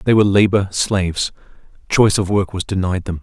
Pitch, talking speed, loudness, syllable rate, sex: 95 Hz, 185 wpm, -17 LUFS, 6.0 syllables/s, male